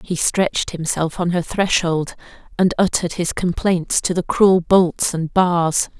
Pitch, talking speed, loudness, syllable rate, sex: 175 Hz, 160 wpm, -18 LUFS, 4.1 syllables/s, female